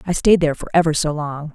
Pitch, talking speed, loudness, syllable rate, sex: 155 Hz, 270 wpm, -18 LUFS, 6.6 syllables/s, female